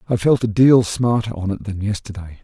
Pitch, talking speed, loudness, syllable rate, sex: 105 Hz, 220 wpm, -18 LUFS, 5.9 syllables/s, male